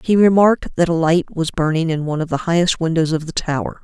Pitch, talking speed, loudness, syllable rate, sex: 165 Hz, 250 wpm, -17 LUFS, 6.2 syllables/s, female